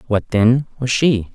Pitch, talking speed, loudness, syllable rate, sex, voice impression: 120 Hz, 180 wpm, -17 LUFS, 3.9 syllables/s, male, masculine, adult-like, slightly refreshing, unique